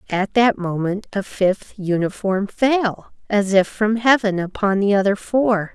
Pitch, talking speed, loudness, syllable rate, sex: 205 Hz, 155 wpm, -19 LUFS, 4.0 syllables/s, female